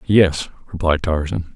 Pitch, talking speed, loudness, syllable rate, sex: 85 Hz, 115 wpm, -19 LUFS, 4.4 syllables/s, male